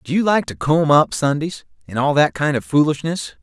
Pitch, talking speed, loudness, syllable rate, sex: 145 Hz, 230 wpm, -18 LUFS, 5.2 syllables/s, male